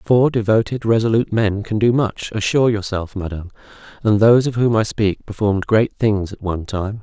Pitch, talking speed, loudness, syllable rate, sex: 110 Hz, 190 wpm, -18 LUFS, 5.7 syllables/s, male